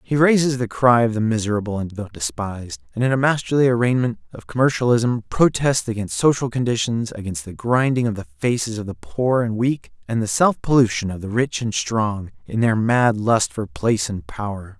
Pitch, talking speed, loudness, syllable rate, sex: 115 Hz, 200 wpm, -20 LUFS, 5.3 syllables/s, male